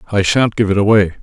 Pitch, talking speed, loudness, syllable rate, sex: 105 Hz, 245 wpm, -14 LUFS, 6.7 syllables/s, male